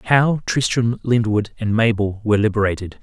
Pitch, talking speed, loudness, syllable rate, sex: 110 Hz, 140 wpm, -19 LUFS, 5.2 syllables/s, male